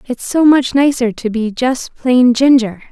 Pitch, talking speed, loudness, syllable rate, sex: 250 Hz, 185 wpm, -13 LUFS, 4.1 syllables/s, female